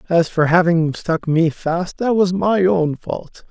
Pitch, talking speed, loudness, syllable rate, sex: 175 Hz, 190 wpm, -18 LUFS, 3.7 syllables/s, male